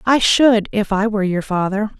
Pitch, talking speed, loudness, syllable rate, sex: 210 Hz, 210 wpm, -16 LUFS, 5.0 syllables/s, female